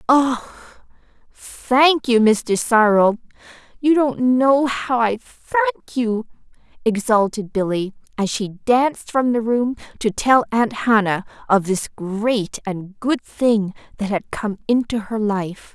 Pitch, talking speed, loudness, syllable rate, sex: 225 Hz, 135 wpm, -19 LUFS, 3.6 syllables/s, female